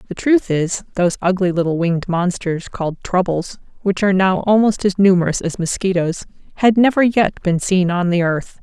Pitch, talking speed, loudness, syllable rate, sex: 185 Hz, 180 wpm, -17 LUFS, 5.3 syllables/s, female